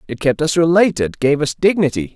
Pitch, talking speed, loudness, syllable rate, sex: 155 Hz, 165 wpm, -16 LUFS, 5.5 syllables/s, male